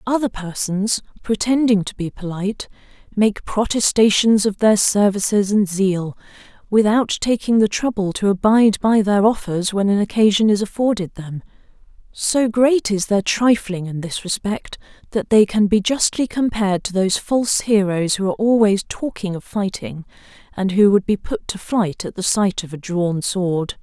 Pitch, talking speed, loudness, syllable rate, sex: 205 Hz, 165 wpm, -18 LUFS, 4.8 syllables/s, female